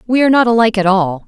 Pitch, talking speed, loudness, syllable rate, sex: 215 Hz, 285 wpm, -12 LUFS, 8.0 syllables/s, female